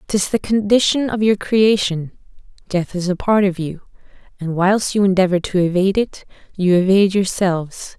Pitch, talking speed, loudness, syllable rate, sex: 190 Hz, 165 wpm, -17 LUFS, 5.1 syllables/s, female